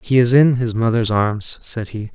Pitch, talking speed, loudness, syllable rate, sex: 115 Hz, 225 wpm, -17 LUFS, 4.5 syllables/s, male